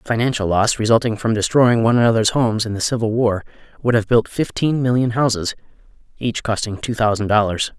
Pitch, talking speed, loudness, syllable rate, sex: 115 Hz, 185 wpm, -18 LUFS, 6.0 syllables/s, male